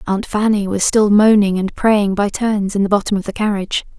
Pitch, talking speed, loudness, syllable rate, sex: 205 Hz, 225 wpm, -16 LUFS, 5.4 syllables/s, female